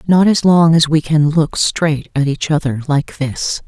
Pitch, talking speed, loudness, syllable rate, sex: 155 Hz, 210 wpm, -14 LUFS, 4.1 syllables/s, female